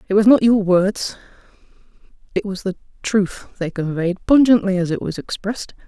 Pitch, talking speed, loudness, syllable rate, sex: 200 Hz, 165 wpm, -19 LUFS, 5.2 syllables/s, female